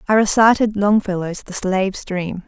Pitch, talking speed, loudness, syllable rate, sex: 200 Hz, 145 wpm, -18 LUFS, 4.8 syllables/s, female